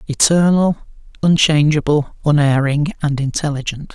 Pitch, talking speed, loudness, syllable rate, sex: 150 Hz, 75 wpm, -16 LUFS, 4.6 syllables/s, male